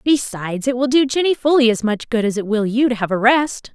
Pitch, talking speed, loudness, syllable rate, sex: 240 Hz, 270 wpm, -17 LUFS, 5.8 syllables/s, female